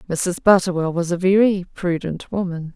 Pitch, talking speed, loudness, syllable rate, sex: 180 Hz, 150 wpm, -19 LUFS, 4.8 syllables/s, female